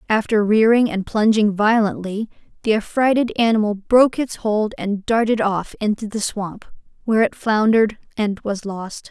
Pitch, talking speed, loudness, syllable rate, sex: 215 Hz, 150 wpm, -19 LUFS, 4.7 syllables/s, female